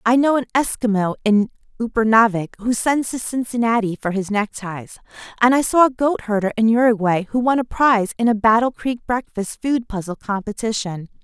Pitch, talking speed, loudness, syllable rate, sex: 225 Hz, 175 wpm, -19 LUFS, 5.2 syllables/s, female